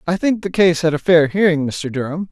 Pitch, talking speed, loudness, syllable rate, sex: 165 Hz, 260 wpm, -16 LUFS, 5.5 syllables/s, male